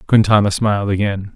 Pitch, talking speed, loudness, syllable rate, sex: 105 Hz, 135 wpm, -16 LUFS, 5.8 syllables/s, male